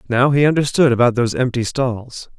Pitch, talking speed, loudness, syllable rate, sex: 125 Hz, 175 wpm, -16 LUFS, 5.6 syllables/s, male